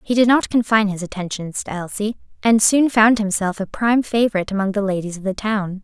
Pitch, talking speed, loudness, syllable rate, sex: 210 Hz, 215 wpm, -19 LUFS, 6.0 syllables/s, female